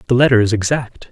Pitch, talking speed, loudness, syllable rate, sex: 120 Hz, 215 wpm, -15 LUFS, 6.6 syllables/s, male